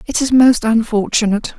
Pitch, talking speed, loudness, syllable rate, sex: 230 Hz, 150 wpm, -14 LUFS, 5.5 syllables/s, female